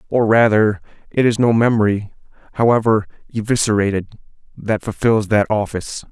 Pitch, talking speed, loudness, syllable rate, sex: 110 Hz, 120 wpm, -17 LUFS, 5.4 syllables/s, male